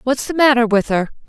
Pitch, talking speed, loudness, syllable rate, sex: 245 Hz, 235 wpm, -16 LUFS, 5.9 syllables/s, female